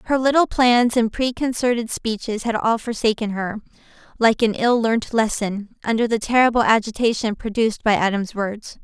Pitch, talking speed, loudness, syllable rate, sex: 225 Hz, 155 wpm, -20 LUFS, 5.1 syllables/s, female